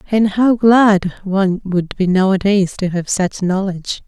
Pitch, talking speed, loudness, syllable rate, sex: 195 Hz, 160 wpm, -15 LUFS, 4.3 syllables/s, female